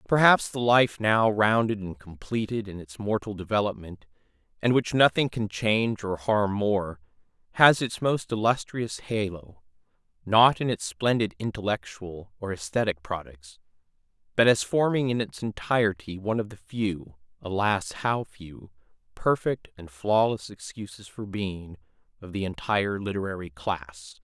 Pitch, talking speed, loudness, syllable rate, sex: 105 Hz, 140 wpm, -26 LUFS, 4.4 syllables/s, male